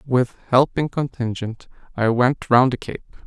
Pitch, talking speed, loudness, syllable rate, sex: 125 Hz, 145 wpm, -20 LUFS, 4.1 syllables/s, male